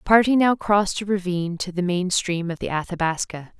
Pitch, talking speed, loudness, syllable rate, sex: 185 Hz, 215 wpm, -22 LUFS, 5.7 syllables/s, female